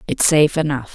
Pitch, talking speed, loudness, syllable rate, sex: 150 Hz, 190 wpm, -16 LUFS, 6.3 syllables/s, female